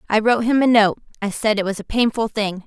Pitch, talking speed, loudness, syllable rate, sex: 220 Hz, 270 wpm, -19 LUFS, 6.2 syllables/s, female